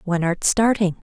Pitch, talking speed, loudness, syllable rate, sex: 190 Hz, 165 wpm, -19 LUFS, 4.5 syllables/s, female